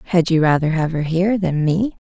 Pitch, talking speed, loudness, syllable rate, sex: 170 Hz, 230 wpm, -18 LUFS, 5.9 syllables/s, female